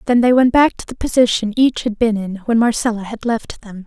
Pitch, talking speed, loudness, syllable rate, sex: 225 Hz, 250 wpm, -16 LUFS, 5.4 syllables/s, female